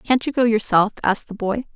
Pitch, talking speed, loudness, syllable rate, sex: 225 Hz, 240 wpm, -20 LUFS, 5.8 syllables/s, female